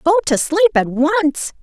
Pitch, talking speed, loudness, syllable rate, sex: 330 Hz, 185 wpm, -16 LUFS, 3.9 syllables/s, female